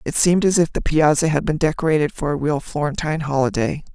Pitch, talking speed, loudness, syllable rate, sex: 155 Hz, 215 wpm, -19 LUFS, 6.4 syllables/s, female